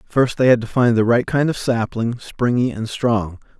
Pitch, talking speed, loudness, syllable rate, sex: 120 Hz, 215 wpm, -18 LUFS, 4.6 syllables/s, male